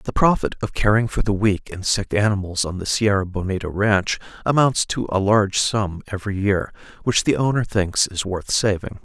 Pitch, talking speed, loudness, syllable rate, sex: 100 Hz, 190 wpm, -21 LUFS, 5.1 syllables/s, male